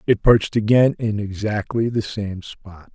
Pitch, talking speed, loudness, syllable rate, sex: 105 Hz, 165 wpm, -20 LUFS, 4.3 syllables/s, male